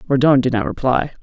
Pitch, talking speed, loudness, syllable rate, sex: 135 Hz, 195 wpm, -17 LUFS, 6.4 syllables/s, male